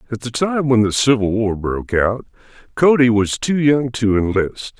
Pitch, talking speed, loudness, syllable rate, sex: 120 Hz, 190 wpm, -17 LUFS, 4.7 syllables/s, male